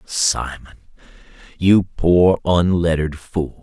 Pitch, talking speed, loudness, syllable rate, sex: 85 Hz, 85 wpm, -17 LUFS, 3.4 syllables/s, male